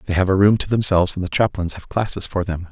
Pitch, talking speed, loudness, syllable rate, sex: 95 Hz, 285 wpm, -19 LUFS, 6.7 syllables/s, male